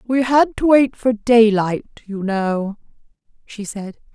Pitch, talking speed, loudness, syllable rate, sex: 225 Hz, 145 wpm, -17 LUFS, 3.6 syllables/s, female